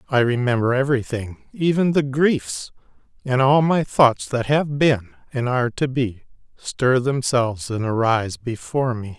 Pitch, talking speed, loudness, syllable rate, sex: 125 Hz, 150 wpm, -20 LUFS, 5.0 syllables/s, male